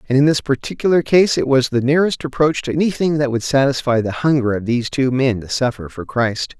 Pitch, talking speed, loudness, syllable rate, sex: 135 Hz, 225 wpm, -17 LUFS, 5.9 syllables/s, male